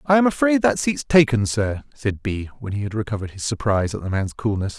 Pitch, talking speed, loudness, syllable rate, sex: 115 Hz, 240 wpm, -21 LUFS, 5.9 syllables/s, male